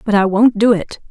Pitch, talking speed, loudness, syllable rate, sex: 210 Hz, 270 wpm, -14 LUFS, 5.3 syllables/s, female